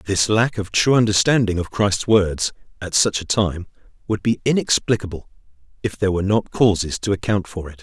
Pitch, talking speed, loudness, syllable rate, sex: 100 Hz, 185 wpm, -19 LUFS, 5.3 syllables/s, male